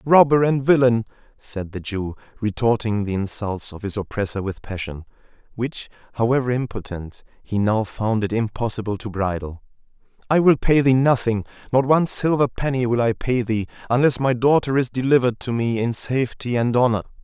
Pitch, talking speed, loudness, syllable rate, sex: 115 Hz, 165 wpm, -21 LUFS, 5.3 syllables/s, male